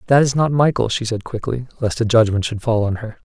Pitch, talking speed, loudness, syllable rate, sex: 115 Hz, 255 wpm, -18 LUFS, 5.8 syllables/s, male